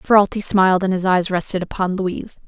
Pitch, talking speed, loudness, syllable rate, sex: 185 Hz, 195 wpm, -18 LUFS, 5.9 syllables/s, female